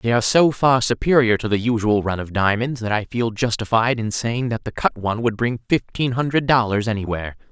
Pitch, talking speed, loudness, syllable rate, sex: 115 Hz, 215 wpm, -20 LUFS, 5.7 syllables/s, male